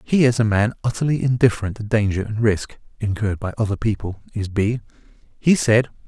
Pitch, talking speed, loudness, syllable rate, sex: 110 Hz, 160 wpm, -20 LUFS, 5.9 syllables/s, male